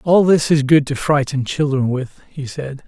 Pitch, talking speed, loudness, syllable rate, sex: 145 Hz, 210 wpm, -17 LUFS, 4.5 syllables/s, male